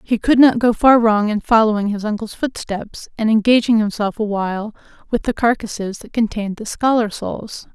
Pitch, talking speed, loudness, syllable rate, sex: 220 Hz, 180 wpm, -17 LUFS, 5.2 syllables/s, female